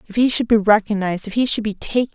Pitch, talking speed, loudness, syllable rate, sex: 215 Hz, 280 wpm, -18 LUFS, 7.0 syllables/s, female